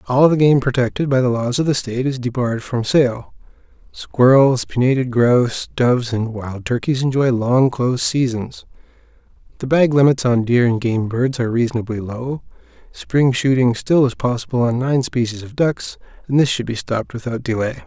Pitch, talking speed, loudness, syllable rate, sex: 125 Hz, 180 wpm, -17 LUFS, 5.2 syllables/s, male